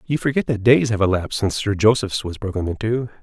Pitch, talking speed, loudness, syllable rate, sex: 105 Hz, 225 wpm, -20 LUFS, 6.4 syllables/s, male